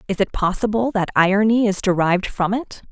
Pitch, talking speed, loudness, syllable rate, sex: 200 Hz, 185 wpm, -19 LUFS, 5.7 syllables/s, female